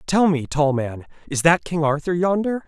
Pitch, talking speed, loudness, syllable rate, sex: 160 Hz, 200 wpm, -20 LUFS, 4.8 syllables/s, male